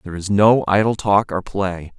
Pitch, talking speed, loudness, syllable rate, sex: 100 Hz, 210 wpm, -18 LUFS, 4.9 syllables/s, male